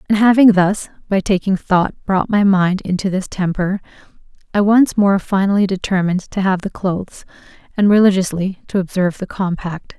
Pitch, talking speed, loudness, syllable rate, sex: 190 Hz, 160 wpm, -16 LUFS, 5.2 syllables/s, female